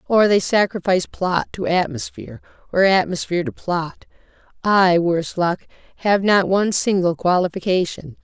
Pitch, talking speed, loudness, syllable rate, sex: 180 Hz, 130 wpm, -19 LUFS, 5.0 syllables/s, female